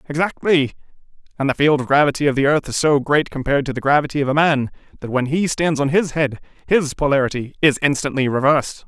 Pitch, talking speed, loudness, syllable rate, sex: 145 Hz, 210 wpm, -18 LUFS, 6.3 syllables/s, male